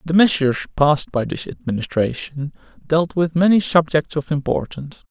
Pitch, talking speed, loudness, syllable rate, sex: 150 Hz, 140 wpm, -19 LUFS, 5.3 syllables/s, male